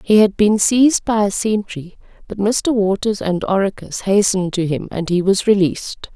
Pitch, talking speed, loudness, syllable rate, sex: 200 Hz, 185 wpm, -17 LUFS, 5.0 syllables/s, female